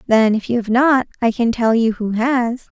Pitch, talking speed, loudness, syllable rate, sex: 235 Hz, 235 wpm, -17 LUFS, 4.6 syllables/s, female